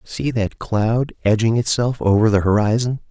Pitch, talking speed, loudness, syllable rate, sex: 110 Hz, 155 wpm, -18 LUFS, 4.6 syllables/s, male